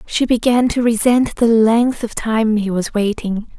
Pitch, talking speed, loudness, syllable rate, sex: 225 Hz, 185 wpm, -16 LUFS, 4.1 syllables/s, female